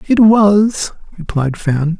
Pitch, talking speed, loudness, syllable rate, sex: 185 Hz, 120 wpm, -13 LUFS, 3.1 syllables/s, male